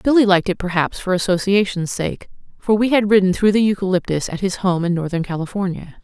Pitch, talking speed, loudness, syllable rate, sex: 190 Hz, 200 wpm, -18 LUFS, 6.0 syllables/s, female